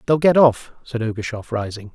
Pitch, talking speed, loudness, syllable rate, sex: 120 Hz, 185 wpm, -19 LUFS, 5.4 syllables/s, male